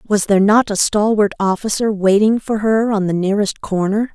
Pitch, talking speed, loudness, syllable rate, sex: 205 Hz, 190 wpm, -16 LUFS, 5.2 syllables/s, female